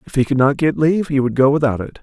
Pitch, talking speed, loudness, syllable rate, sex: 140 Hz, 325 wpm, -16 LUFS, 7.0 syllables/s, male